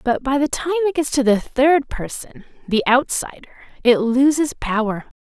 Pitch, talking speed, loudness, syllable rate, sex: 265 Hz, 150 wpm, -18 LUFS, 4.9 syllables/s, female